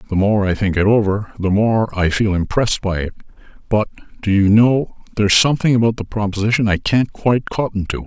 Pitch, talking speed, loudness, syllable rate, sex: 105 Hz, 200 wpm, -17 LUFS, 6.0 syllables/s, male